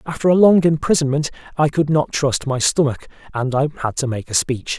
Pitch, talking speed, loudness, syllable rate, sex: 145 Hz, 215 wpm, -18 LUFS, 5.5 syllables/s, male